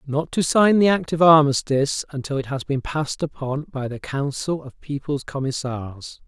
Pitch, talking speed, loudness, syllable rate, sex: 145 Hz, 180 wpm, -21 LUFS, 4.8 syllables/s, male